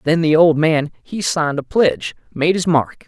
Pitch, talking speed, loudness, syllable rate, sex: 160 Hz, 215 wpm, -16 LUFS, 4.7 syllables/s, male